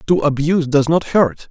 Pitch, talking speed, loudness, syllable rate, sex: 150 Hz, 200 wpm, -16 LUFS, 5.1 syllables/s, male